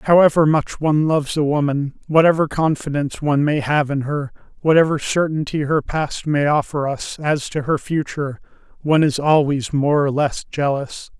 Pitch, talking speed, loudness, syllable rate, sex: 150 Hz, 165 wpm, -19 LUFS, 5.1 syllables/s, male